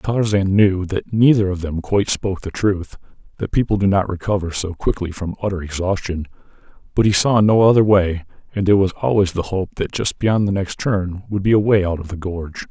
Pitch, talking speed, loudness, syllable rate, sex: 95 Hz, 215 wpm, -18 LUFS, 5.5 syllables/s, male